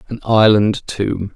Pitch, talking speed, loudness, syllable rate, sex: 105 Hz, 135 wpm, -15 LUFS, 3.6 syllables/s, male